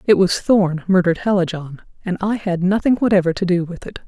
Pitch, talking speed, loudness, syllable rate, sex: 185 Hz, 205 wpm, -18 LUFS, 5.8 syllables/s, female